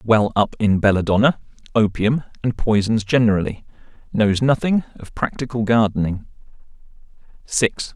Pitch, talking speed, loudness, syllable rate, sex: 110 Hz, 105 wpm, -19 LUFS, 4.9 syllables/s, male